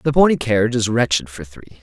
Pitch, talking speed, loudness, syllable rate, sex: 115 Hz, 230 wpm, -17 LUFS, 6.8 syllables/s, male